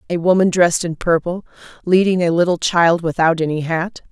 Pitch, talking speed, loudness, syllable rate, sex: 170 Hz, 175 wpm, -16 LUFS, 5.5 syllables/s, female